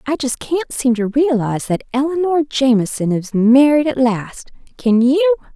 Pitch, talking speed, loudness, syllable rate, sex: 255 Hz, 160 wpm, -16 LUFS, 4.6 syllables/s, female